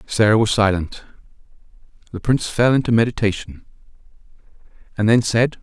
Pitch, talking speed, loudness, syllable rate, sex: 110 Hz, 115 wpm, -18 LUFS, 5.8 syllables/s, male